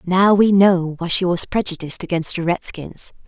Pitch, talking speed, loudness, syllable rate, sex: 180 Hz, 185 wpm, -18 LUFS, 5.0 syllables/s, female